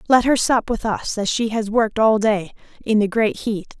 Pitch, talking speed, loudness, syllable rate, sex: 220 Hz, 235 wpm, -19 LUFS, 4.9 syllables/s, female